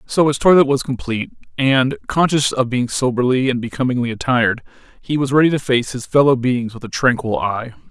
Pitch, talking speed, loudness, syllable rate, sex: 130 Hz, 190 wpm, -17 LUFS, 5.6 syllables/s, male